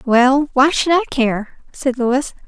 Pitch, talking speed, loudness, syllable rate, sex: 265 Hz, 170 wpm, -16 LUFS, 3.3 syllables/s, female